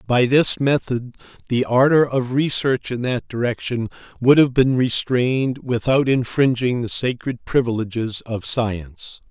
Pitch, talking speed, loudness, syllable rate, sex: 125 Hz, 135 wpm, -19 LUFS, 4.3 syllables/s, male